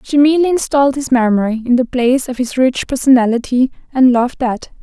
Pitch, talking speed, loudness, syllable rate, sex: 255 Hz, 185 wpm, -14 LUFS, 6.2 syllables/s, female